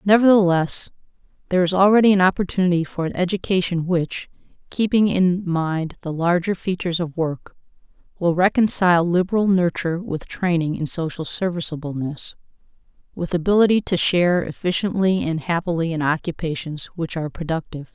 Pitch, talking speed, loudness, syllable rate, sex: 175 Hz, 130 wpm, -20 LUFS, 5.6 syllables/s, female